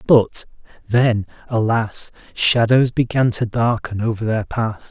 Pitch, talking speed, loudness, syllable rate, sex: 115 Hz, 120 wpm, -18 LUFS, 3.8 syllables/s, male